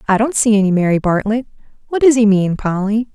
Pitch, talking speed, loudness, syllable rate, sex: 215 Hz, 210 wpm, -15 LUFS, 6.0 syllables/s, female